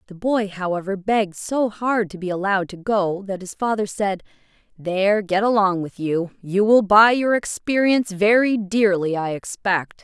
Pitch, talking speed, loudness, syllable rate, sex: 200 Hz, 175 wpm, -20 LUFS, 4.7 syllables/s, female